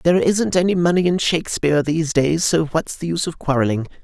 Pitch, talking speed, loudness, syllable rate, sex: 165 Hz, 210 wpm, -19 LUFS, 6.2 syllables/s, male